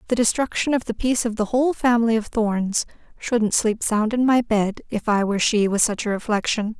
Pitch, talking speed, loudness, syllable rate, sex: 225 Hz, 210 wpm, -21 LUFS, 5.5 syllables/s, female